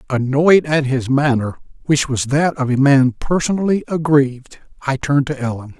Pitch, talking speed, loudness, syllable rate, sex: 140 Hz, 165 wpm, -17 LUFS, 5.0 syllables/s, male